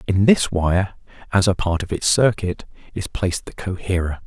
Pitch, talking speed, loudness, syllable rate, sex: 95 Hz, 155 wpm, -20 LUFS, 4.9 syllables/s, male